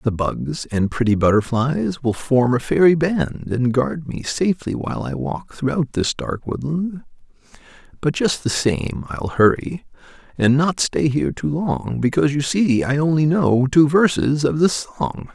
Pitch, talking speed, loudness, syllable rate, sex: 135 Hz, 170 wpm, -19 LUFS, 4.4 syllables/s, male